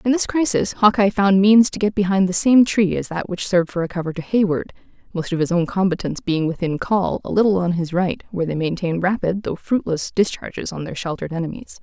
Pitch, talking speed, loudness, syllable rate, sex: 185 Hz, 230 wpm, -19 LUFS, 5.9 syllables/s, female